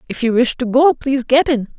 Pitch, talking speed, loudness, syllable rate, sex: 260 Hz, 270 wpm, -15 LUFS, 6.0 syllables/s, female